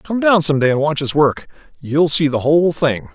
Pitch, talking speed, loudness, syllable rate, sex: 150 Hz, 250 wpm, -15 LUFS, 5.1 syllables/s, male